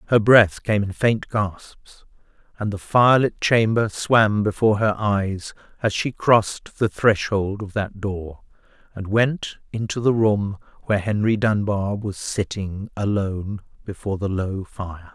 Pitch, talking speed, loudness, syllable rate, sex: 105 Hz, 145 wpm, -21 LUFS, 4.1 syllables/s, male